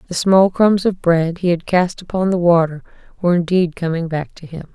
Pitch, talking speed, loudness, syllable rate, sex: 175 Hz, 215 wpm, -16 LUFS, 5.3 syllables/s, female